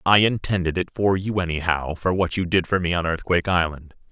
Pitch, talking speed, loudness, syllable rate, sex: 90 Hz, 220 wpm, -22 LUFS, 5.9 syllables/s, male